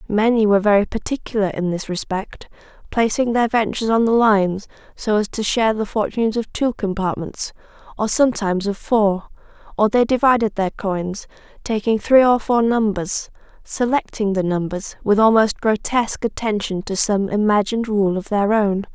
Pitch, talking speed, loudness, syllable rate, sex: 210 Hz, 160 wpm, -19 LUFS, 5.1 syllables/s, female